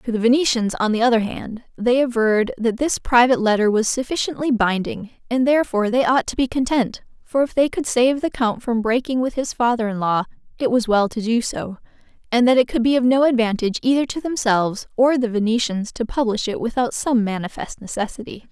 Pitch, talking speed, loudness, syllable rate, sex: 235 Hz, 205 wpm, -19 LUFS, 5.8 syllables/s, female